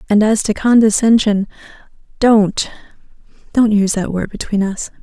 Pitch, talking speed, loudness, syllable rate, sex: 210 Hz, 120 wpm, -15 LUFS, 5.0 syllables/s, female